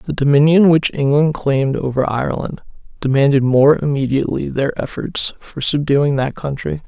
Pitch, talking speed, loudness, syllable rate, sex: 145 Hz, 140 wpm, -16 LUFS, 5.0 syllables/s, male